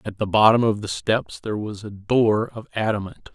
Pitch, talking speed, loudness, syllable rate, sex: 105 Hz, 215 wpm, -21 LUFS, 5.1 syllables/s, male